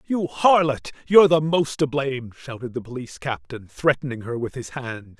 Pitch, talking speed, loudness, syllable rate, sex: 135 Hz, 185 wpm, -22 LUFS, 5.2 syllables/s, male